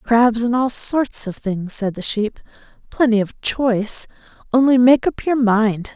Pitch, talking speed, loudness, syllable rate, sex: 230 Hz, 170 wpm, -18 LUFS, 4.0 syllables/s, female